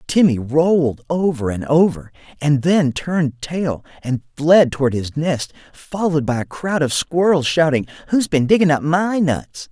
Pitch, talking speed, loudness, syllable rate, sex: 150 Hz, 165 wpm, -18 LUFS, 4.5 syllables/s, male